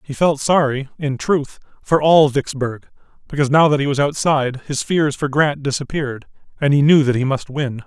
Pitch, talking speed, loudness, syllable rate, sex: 140 Hz, 200 wpm, -17 LUFS, 5.3 syllables/s, male